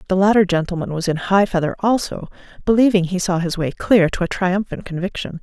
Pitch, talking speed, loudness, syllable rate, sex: 185 Hz, 200 wpm, -18 LUFS, 5.8 syllables/s, female